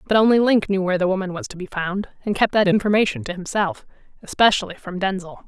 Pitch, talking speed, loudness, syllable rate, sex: 195 Hz, 210 wpm, -20 LUFS, 6.3 syllables/s, female